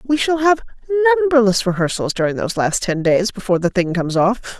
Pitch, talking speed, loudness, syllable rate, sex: 225 Hz, 195 wpm, -17 LUFS, 6.6 syllables/s, female